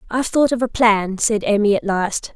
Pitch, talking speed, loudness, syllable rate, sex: 220 Hz, 230 wpm, -18 LUFS, 5.2 syllables/s, female